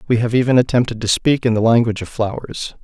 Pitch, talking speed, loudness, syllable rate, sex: 115 Hz, 235 wpm, -17 LUFS, 6.6 syllables/s, male